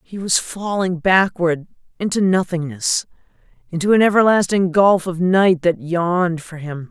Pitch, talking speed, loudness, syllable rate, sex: 180 Hz, 140 wpm, -17 LUFS, 4.4 syllables/s, female